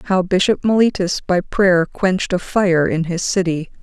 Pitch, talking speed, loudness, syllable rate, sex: 185 Hz, 175 wpm, -17 LUFS, 4.5 syllables/s, female